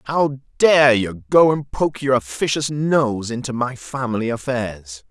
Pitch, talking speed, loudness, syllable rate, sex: 130 Hz, 155 wpm, -19 LUFS, 3.9 syllables/s, male